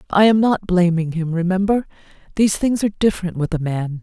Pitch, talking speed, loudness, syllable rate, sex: 185 Hz, 195 wpm, -18 LUFS, 6.0 syllables/s, female